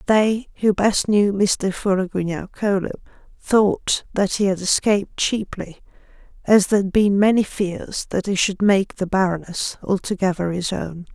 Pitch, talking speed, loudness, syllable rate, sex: 195 Hz, 150 wpm, -20 LUFS, 4.4 syllables/s, female